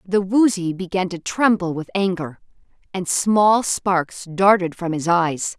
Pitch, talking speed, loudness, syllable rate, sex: 185 Hz, 150 wpm, -19 LUFS, 3.9 syllables/s, female